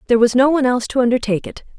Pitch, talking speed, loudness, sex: 240 Hz, 270 wpm, -16 LUFS, female